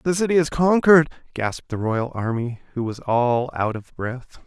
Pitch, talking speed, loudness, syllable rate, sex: 135 Hz, 190 wpm, -21 LUFS, 4.8 syllables/s, male